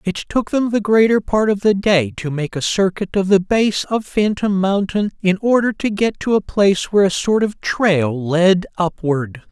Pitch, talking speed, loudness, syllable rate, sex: 195 Hz, 210 wpm, -17 LUFS, 4.5 syllables/s, male